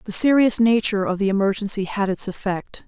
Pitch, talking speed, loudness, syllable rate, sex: 205 Hz, 190 wpm, -20 LUFS, 5.9 syllables/s, female